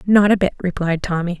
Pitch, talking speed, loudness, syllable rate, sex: 185 Hz, 215 wpm, -18 LUFS, 5.7 syllables/s, female